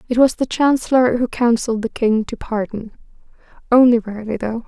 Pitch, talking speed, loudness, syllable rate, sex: 235 Hz, 165 wpm, -17 LUFS, 5.7 syllables/s, female